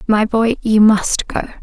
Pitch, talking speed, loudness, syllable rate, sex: 220 Hz, 185 wpm, -15 LUFS, 3.9 syllables/s, female